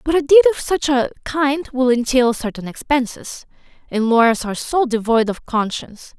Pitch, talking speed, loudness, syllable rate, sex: 255 Hz, 175 wpm, -17 LUFS, 5.0 syllables/s, female